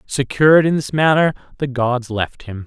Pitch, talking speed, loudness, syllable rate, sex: 135 Hz, 180 wpm, -17 LUFS, 4.8 syllables/s, male